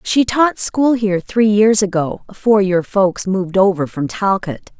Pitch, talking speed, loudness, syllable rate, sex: 200 Hz, 175 wpm, -15 LUFS, 4.6 syllables/s, female